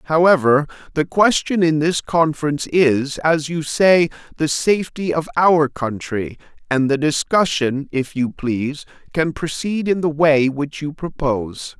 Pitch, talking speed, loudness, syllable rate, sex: 150 Hz, 150 wpm, -18 LUFS, 4.3 syllables/s, male